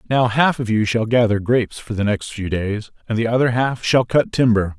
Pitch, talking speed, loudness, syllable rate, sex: 115 Hz, 240 wpm, -19 LUFS, 5.2 syllables/s, male